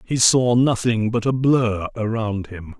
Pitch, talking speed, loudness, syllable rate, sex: 115 Hz, 170 wpm, -19 LUFS, 4.0 syllables/s, male